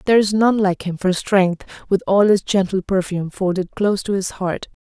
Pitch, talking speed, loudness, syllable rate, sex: 190 Hz, 210 wpm, -19 LUFS, 5.3 syllables/s, female